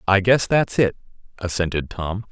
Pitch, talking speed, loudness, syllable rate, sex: 100 Hz, 155 wpm, -20 LUFS, 4.8 syllables/s, male